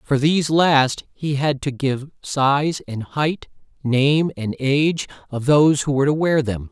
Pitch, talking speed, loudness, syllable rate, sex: 140 Hz, 180 wpm, -19 LUFS, 4.2 syllables/s, male